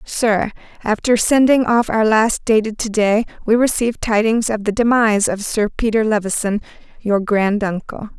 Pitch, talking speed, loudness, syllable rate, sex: 220 Hz, 155 wpm, -17 LUFS, 4.8 syllables/s, female